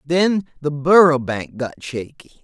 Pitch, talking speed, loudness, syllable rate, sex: 150 Hz, 150 wpm, -18 LUFS, 3.9 syllables/s, male